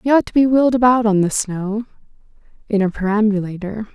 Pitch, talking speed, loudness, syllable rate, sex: 215 Hz, 180 wpm, -17 LUFS, 6.0 syllables/s, female